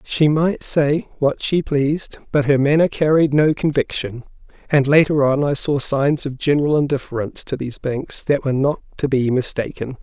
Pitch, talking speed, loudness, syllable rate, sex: 140 Hz, 180 wpm, -18 LUFS, 5.1 syllables/s, male